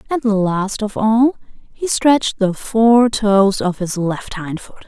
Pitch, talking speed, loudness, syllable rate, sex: 210 Hz, 160 wpm, -16 LUFS, 3.4 syllables/s, female